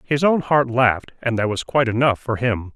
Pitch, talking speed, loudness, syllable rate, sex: 125 Hz, 240 wpm, -19 LUFS, 5.5 syllables/s, male